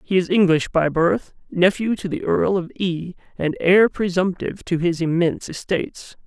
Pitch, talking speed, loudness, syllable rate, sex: 180 Hz, 170 wpm, -20 LUFS, 4.8 syllables/s, male